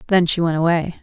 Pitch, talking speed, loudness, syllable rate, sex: 170 Hz, 235 wpm, -18 LUFS, 6.4 syllables/s, female